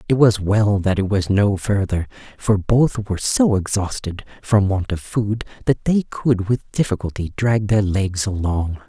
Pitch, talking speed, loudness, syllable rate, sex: 100 Hz, 175 wpm, -19 LUFS, 4.3 syllables/s, male